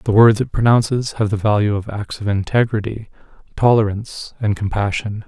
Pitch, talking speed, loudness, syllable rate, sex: 105 Hz, 160 wpm, -18 LUFS, 5.3 syllables/s, male